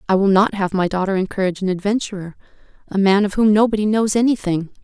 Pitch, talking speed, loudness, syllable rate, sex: 200 Hz, 185 wpm, -18 LUFS, 6.7 syllables/s, female